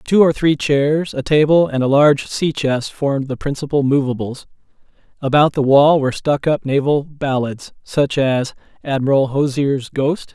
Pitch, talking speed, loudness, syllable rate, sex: 140 Hz, 160 wpm, -17 LUFS, 4.6 syllables/s, male